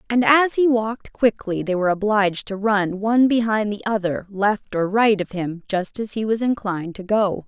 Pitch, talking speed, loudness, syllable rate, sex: 210 Hz, 210 wpm, -20 LUFS, 5.1 syllables/s, female